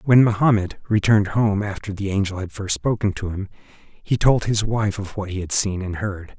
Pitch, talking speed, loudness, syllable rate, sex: 100 Hz, 215 wpm, -21 LUFS, 4.9 syllables/s, male